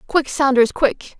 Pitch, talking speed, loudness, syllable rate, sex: 265 Hz, 150 wpm, -17 LUFS, 3.9 syllables/s, female